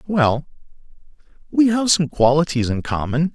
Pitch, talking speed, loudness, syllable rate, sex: 155 Hz, 125 wpm, -18 LUFS, 4.6 syllables/s, male